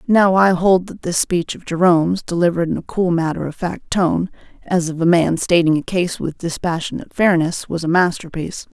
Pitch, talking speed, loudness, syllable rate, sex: 175 Hz, 200 wpm, -18 LUFS, 5.4 syllables/s, female